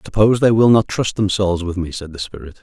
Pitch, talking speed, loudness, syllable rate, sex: 100 Hz, 250 wpm, -17 LUFS, 6.5 syllables/s, male